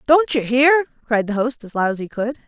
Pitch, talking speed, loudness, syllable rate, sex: 250 Hz, 265 wpm, -19 LUFS, 5.4 syllables/s, female